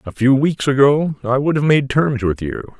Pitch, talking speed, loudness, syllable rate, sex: 135 Hz, 235 wpm, -16 LUFS, 4.6 syllables/s, male